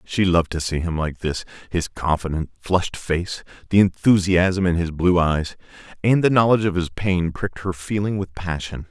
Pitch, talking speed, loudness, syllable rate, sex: 90 Hz, 190 wpm, -21 LUFS, 5.0 syllables/s, male